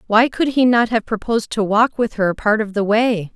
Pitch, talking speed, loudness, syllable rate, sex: 220 Hz, 250 wpm, -17 LUFS, 5.0 syllables/s, female